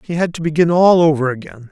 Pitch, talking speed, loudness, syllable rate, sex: 160 Hz, 245 wpm, -14 LUFS, 6.2 syllables/s, male